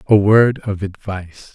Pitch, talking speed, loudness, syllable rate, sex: 100 Hz, 155 wpm, -16 LUFS, 4.3 syllables/s, male